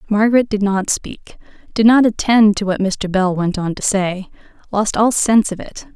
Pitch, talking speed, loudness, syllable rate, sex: 205 Hz, 200 wpm, -16 LUFS, 4.9 syllables/s, female